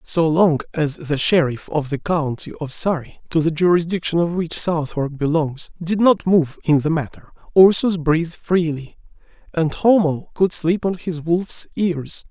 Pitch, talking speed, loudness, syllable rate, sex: 165 Hz, 165 wpm, -19 LUFS, 4.4 syllables/s, male